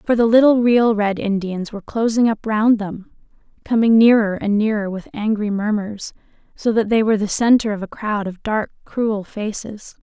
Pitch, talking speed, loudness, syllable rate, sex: 215 Hz, 185 wpm, -18 LUFS, 4.9 syllables/s, female